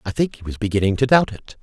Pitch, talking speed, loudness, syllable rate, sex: 115 Hz, 295 wpm, -20 LUFS, 6.8 syllables/s, male